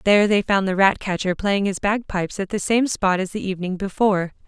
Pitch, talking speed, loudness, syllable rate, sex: 195 Hz, 215 wpm, -21 LUFS, 5.9 syllables/s, female